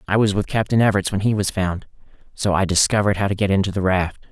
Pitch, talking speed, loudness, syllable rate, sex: 100 Hz, 250 wpm, -19 LUFS, 6.7 syllables/s, male